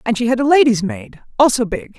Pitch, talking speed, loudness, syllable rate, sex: 255 Hz, 240 wpm, -15 LUFS, 5.8 syllables/s, female